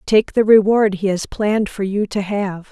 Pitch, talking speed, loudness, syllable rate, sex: 205 Hz, 220 wpm, -17 LUFS, 4.7 syllables/s, female